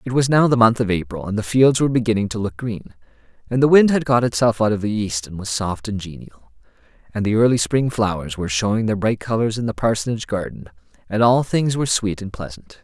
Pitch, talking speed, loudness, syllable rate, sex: 110 Hz, 240 wpm, -19 LUFS, 6.0 syllables/s, male